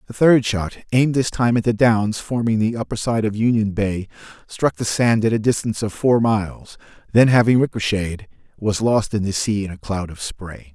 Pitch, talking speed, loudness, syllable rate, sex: 110 Hz, 210 wpm, -19 LUFS, 5.2 syllables/s, male